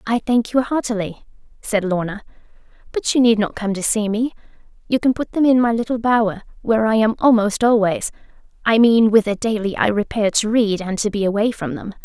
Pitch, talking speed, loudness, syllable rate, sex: 220 Hz, 200 wpm, -18 LUFS, 5.6 syllables/s, female